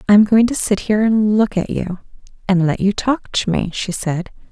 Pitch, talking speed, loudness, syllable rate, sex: 205 Hz, 240 wpm, -17 LUFS, 5.2 syllables/s, female